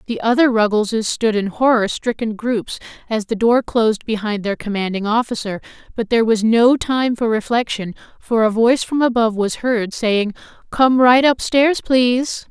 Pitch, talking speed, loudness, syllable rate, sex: 230 Hz, 175 wpm, -17 LUFS, 4.9 syllables/s, female